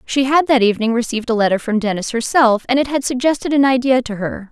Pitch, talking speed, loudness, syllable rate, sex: 245 Hz, 240 wpm, -16 LUFS, 6.4 syllables/s, female